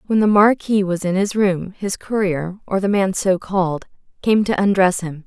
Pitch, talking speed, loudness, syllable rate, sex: 190 Hz, 205 wpm, -18 LUFS, 4.7 syllables/s, female